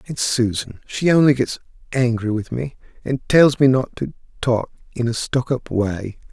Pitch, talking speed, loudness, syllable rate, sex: 125 Hz, 180 wpm, -20 LUFS, 4.5 syllables/s, male